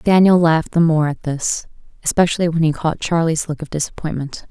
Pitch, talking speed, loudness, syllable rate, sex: 160 Hz, 185 wpm, -18 LUFS, 5.6 syllables/s, female